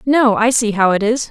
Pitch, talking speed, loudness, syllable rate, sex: 230 Hz, 275 wpm, -14 LUFS, 5.0 syllables/s, female